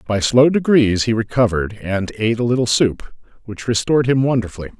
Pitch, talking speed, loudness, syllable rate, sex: 115 Hz, 175 wpm, -17 LUFS, 6.0 syllables/s, male